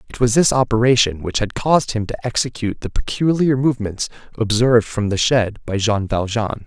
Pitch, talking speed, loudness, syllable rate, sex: 115 Hz, 180 wpm, -18 LUFS, 5.7 syllables/s, male